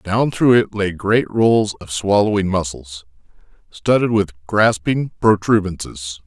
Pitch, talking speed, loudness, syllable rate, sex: 100 Hz, 125 wpm, -17 LUFS, 4.2 syllables/s, male